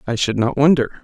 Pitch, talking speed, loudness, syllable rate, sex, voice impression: 130 Hz, 230 wpm, -17 LUFS, 6.4 syllables/s, male, masculine, adult-like, fluent, slightly intellectual, slightly refreshing, slightly friendly